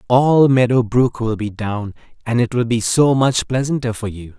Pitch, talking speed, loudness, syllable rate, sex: 120 Hz, 205 wpm, -17 LUFS, 4.7 syllables/s, male